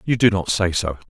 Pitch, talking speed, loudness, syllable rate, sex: 95 Hz, 270 wpm, -19 LUFS, 5.5 syllables/s, male